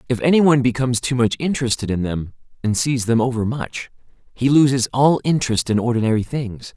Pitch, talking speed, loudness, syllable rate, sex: 125 Hz, 185 wpm, -19 LUFS, 6.1 syllables/s, male